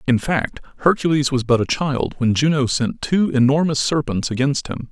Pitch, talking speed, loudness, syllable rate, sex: 140 Hz, 185 wpm, -19 LUFS, 4.9 syllables/s, male